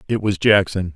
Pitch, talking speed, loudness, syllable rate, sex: 100 Hz, 190 wpm, -17 LUFS, 5.2 syllables/s, male